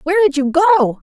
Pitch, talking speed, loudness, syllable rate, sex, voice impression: 320 Hz, 215 wpm, -14 LUFS, 5.4 syllables/s, female, feminine, adult-like, clear, slightly intellectual, slightly strict